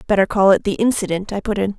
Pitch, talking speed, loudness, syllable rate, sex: 200 Hz, 270 wpm, -18 LUFS, 6.8 syllables/s, female